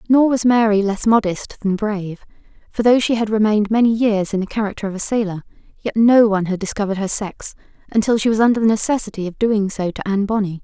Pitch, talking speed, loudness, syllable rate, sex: 210 Hz, 220 wpm, -18 LUFS, 6.3 syllables/s, female